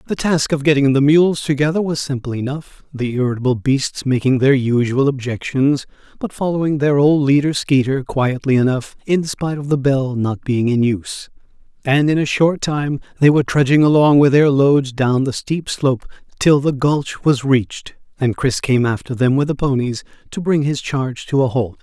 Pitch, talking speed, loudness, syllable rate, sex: 135 Hz, 190 wpm, -17 LUFS, 5.0 syllables/s, male